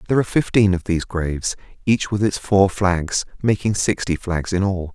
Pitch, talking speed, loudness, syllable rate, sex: 95 Hz, 195 wpm, -20 LUFS, 5.4 syllables/s, male